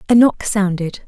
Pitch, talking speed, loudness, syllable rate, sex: 200 Hz, 170 wpm, -16 LUFS, 4.5 syllables/s, female